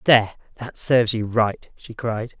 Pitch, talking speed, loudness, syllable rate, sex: 115 Hz, 175 wpm, -21 LUFS, 4.8 syllables/s, male